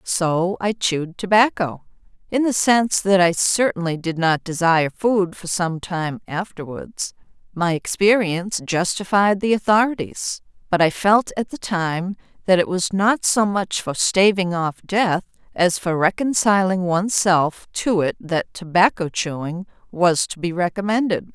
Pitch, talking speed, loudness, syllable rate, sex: 185 Hz, 145 wpm, -20 LUFS, 4.3 syllables/s, female